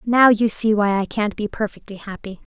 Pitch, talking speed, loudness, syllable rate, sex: 210 Hz, 210 wpm, -19 LUFS, 5.1 syllables/s, female